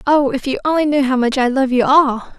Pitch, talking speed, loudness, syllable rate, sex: 270 Hz, 275 wpm, -15 LUFS, 5.7 syllables/s, female